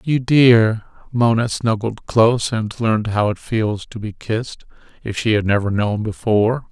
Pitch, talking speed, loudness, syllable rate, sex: 110 Hz, 170 wpm, -18 LUFS, 4.5 syllables/s, male